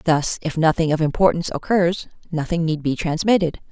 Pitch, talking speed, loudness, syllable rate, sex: 165 Hz, 160 wpm, -20 LUFS, 5.6 syllables/s, female